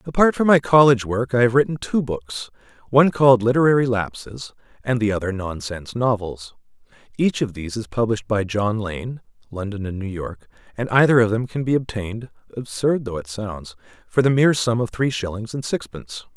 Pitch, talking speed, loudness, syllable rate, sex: 115 Hz, 185 wpm, -20 LUFS, 5.6 syllables/s, male